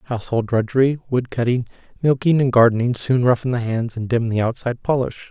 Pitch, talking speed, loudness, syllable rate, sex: 120 Hz, 170 wpm, -19 LUFS, 5.8 syllables/s, male